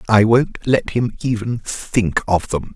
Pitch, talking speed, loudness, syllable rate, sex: 110 Hz, 175 wpm, -18 LUFS, 3.8 syllables/s, male